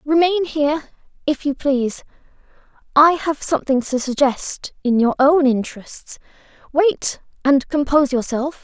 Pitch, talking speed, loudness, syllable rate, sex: 285 Hz, 125 wpm, -18 LUFS, 4.6 syllables/s, female